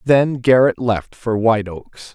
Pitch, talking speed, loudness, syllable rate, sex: 115 Hz, 170 wpm, -17 LUFS, 3.9 syllables/s, male